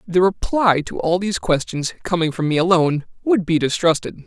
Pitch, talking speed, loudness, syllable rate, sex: 175 Hz, 185 wpm, -19 LUFS, 5.4 syllables/s, male